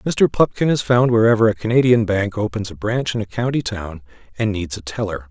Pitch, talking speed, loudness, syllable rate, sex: 110 Hz, 215 wpm, -19 LUFS, 5.5 syllables/s, male